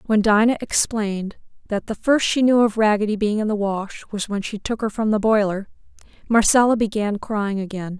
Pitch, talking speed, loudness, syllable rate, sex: 210 Hz, 195 wpm, -20 LUFS, 5.2 syllables/s, female